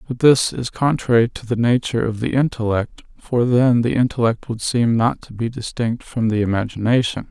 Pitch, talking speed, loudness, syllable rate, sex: 120 Hz, 190 wpm, -19 LUFS, 5.1 syllables/s, male